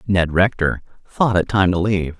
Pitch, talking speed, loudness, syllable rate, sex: 95 Hz, 190 wpm, -18 LUFS, 5.0 syllables/s, male